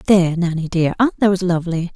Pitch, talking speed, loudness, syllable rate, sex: 180 Hz, 185 wpm, -18 LUFS, 6.4 syllables/s, female